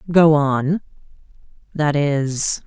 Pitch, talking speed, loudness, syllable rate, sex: 150 Hz, 70 wpm, -18 LUFS, 2.6 syllables/s, female